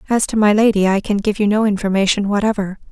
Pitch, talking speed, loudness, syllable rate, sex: 205 Hz, 225 wpm, -16 LUFS, 6.5 syllables/s, female